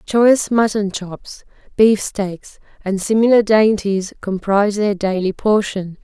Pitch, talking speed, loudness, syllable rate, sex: 205 Hz, 120 wpm, -16 LUFS, 4.0 syllables/s, female